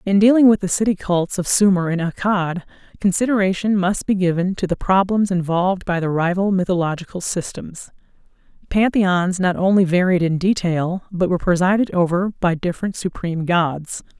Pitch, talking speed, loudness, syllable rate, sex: 185 Hz, 155 wpm, -19 LUFS, 5.3 syllables/s, female